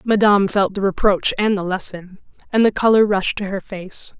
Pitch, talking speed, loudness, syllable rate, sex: 200 Hz, 200 wpm, -18 LUFS, 5.1 syllables/s, female